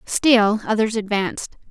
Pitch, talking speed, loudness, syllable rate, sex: 215 Hz, 105 wpm, -19 LUFS, 4.4 syllables/s, female